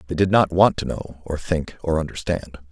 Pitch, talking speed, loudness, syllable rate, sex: 80 Hz, 220 wpm, -22 LUFS, 5.6 syllables/s, male